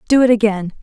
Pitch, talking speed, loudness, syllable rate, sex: 220 Hz, 220 wpm, -14 LUFS, 6.8 syllables/s, female